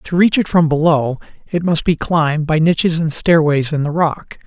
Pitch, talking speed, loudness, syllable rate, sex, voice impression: 160 Hz, 215 wpm, -15 LUFS, 4.9 syllables/s, male, very masculine, slightly middle-aged, slightly thick, tensed, powerful, bright, slightly soft, clear, fluent, slightly raspy, cool, very intellectual, refreshing, sincere, calm, slightly mature, slightly friendly, reassuring, unique, slightly elegant, slightly wild, sweet, lively, kind, slightly sharp, modest